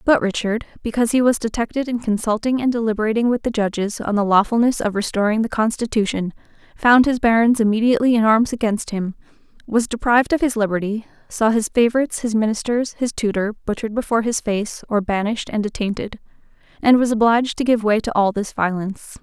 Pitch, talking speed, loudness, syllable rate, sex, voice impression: 225 Hz, 180 wpm, -19 LUFS, 6.2 syllables/s, female, feminine, adult-like, tensed, powerful, clear, fluent, intellectual, elegant, lively, sharp